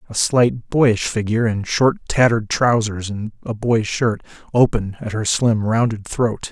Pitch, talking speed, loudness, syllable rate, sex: 115 Hz, 165 wpm, -19 LUFS, 4.3 syllables/s, male